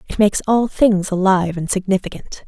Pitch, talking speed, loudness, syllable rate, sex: 195 Hz, 170 wpm, -17 LUFS, 5.7 syllables/s, female